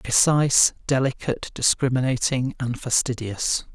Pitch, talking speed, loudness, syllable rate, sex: 130 Hz, 80 wpm, -22 LUFS, 4.6 syllables/s, male